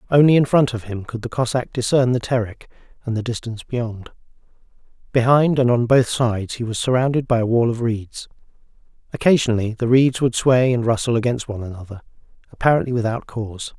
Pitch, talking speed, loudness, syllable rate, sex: 120 Hz, 180 wpm, -19 LUFS, 6.0 syllables/s, male